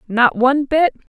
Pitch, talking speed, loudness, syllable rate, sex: 265 Hz, 155 wpm, -16 LUFS, 5.1 syllables/s, female